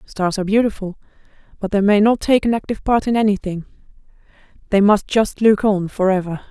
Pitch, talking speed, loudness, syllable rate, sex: 205 Hz, 185 wpm, -17 LUFS, 6.0 syllables/s, female